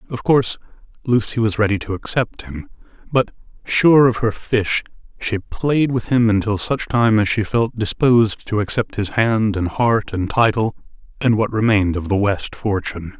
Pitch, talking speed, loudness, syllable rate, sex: 110 Hz, 175 wpm, -18 LUFS, 4.8 syllables/s, male